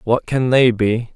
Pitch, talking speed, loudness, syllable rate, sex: 120 Hz, 205 wpm, -16 LUFS, 3.8 syllables/s, male